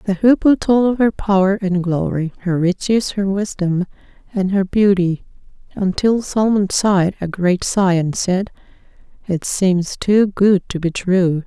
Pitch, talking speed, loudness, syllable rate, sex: 190 Hz, 155 wpm, -17 LUFS, 4.3 syllables/s, female